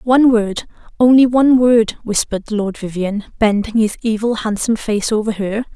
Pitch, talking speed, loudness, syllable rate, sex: 220 Hz, 145 wpm, -15 LUFS, 5.3 syllables/s, female